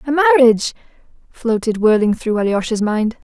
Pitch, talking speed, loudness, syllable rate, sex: 235 Hz, 125 wpm, -16 LUFS, 5.2 syllables/s, female